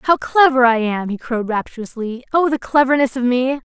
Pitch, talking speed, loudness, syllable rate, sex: 255 Hz, 195 wpm, -17 LUFS, 5.4 syllables/s, female